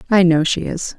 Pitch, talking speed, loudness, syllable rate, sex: 175 Hz, 245 wpm, -16 LUFS, 5.1 syllables/s, female